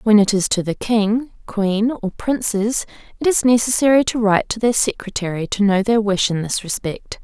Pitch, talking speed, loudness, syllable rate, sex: 215 Hz, 200 wpm, -18 LUFS, 5.0 syllables/s, female